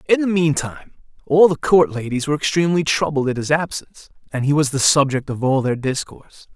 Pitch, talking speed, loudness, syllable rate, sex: 150 Hz, 200 wpm, -18 LUFS, 6.0 syllables/s, male